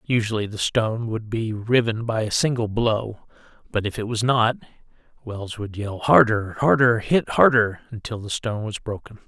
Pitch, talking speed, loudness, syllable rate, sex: 110 Hz, 175 wpm, -22 LUFS, 4.8 syllables/s, male